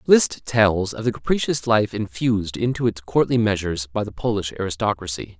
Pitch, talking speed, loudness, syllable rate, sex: 105 Hz, 165 wpm, -21 LUFS, 5.5 syllables/s, male